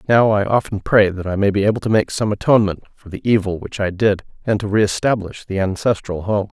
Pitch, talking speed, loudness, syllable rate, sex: 100 Hz, 230 wpm, -18 LUFS, 5.8 syllables/s, male